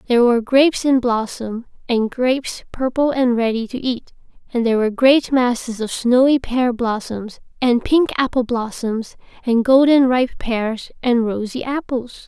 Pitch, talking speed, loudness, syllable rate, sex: 245 Hz, 155 wpm, -18 LUFS, 4.7 syllables/s, female